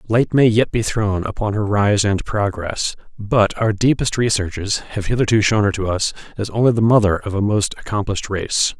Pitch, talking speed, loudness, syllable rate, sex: 105 Hz, 200 wpm, -18 LUFS, 5.1 syllables/s, male